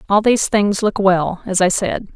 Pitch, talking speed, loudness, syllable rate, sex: 200 Hz, 225 wpm, -16 LUFS, 4.8 syllables/s, female